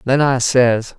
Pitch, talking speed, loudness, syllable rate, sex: 125 Hz, 185 wpm, -15 LUFS, 3.5 syllables/s, male